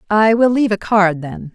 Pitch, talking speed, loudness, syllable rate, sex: 205 Hz, 235 wpm, -14 LUFS, 5.2 syllables/s, female